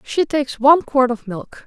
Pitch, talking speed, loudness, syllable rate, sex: 265 Hz, 215 wpm, -17 LUFS, 5.1 syllables/s, female